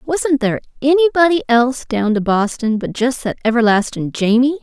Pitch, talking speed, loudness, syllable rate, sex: 245 Hz, 155 wpm, -16 LUFS, 5.2 syllables/s, female